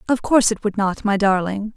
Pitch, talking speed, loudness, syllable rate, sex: 210 Hz, 240 wpm, -19 LUFS, 5.7 syllables/s, female